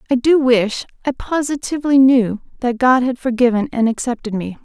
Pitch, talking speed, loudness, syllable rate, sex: 250 Hz, 170 wpm, -16 LUFS, 5.3 syllables/s, female